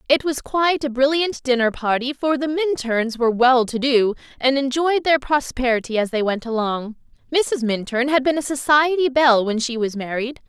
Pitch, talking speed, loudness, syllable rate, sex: 260 Hz, 190 wpm, -19 LUFS, 5.1 syllables/s, female